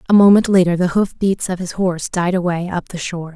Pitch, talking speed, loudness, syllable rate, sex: 180 Hz, 250 wpm, -17 LUFS, 6.0 syllables/s, female